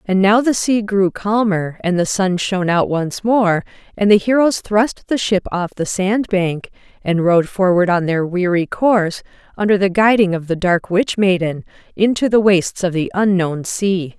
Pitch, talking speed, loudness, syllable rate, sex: 190 Hz, 190 wpm, -16 LUFS, 4.6 syllables/s, female